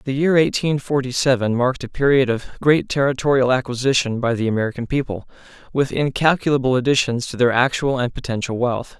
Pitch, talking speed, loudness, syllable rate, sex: 130 Hz, 165 wpm, -19 LUFS, 5.9 syllables/s, male